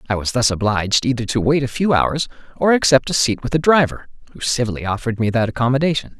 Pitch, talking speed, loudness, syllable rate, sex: 125 Hz, 225 wpm, -18 LUFS, 6.6 syllables/s, male